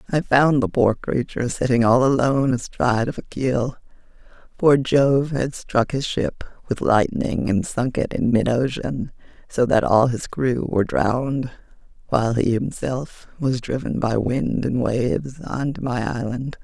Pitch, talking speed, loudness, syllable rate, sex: 125 Hz, 165 wpm, -21 LUFS, 4.4 syllables/s, female